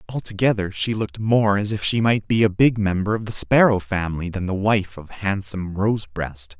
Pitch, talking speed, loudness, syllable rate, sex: 100 Hz, 200 wpm, -21 LUFS, 5.3 syllables/s, male